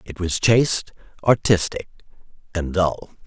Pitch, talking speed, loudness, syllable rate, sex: 95 Hz, 110 wpm, -20 LUFS, 4.6 syllables/s, male